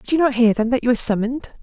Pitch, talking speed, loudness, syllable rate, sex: 245 Hz, 335 wpm, -18 LUFS, 7.6 syllables/s, female